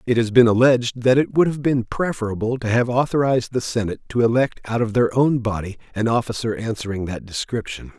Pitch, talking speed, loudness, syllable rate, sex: 120 Hz, 205 wpm, -20 LUFS, 6.0 syllables/s, male